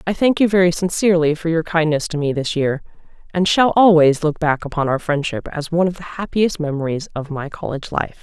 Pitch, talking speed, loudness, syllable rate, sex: 165 Hz, 220 wpm, -18 LUFS, 5.9 syllables/s, female